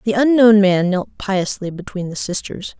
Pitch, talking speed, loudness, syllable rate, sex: 195 Hz, 170 wpm, -17 LUFS, 4.5 syllables/s, female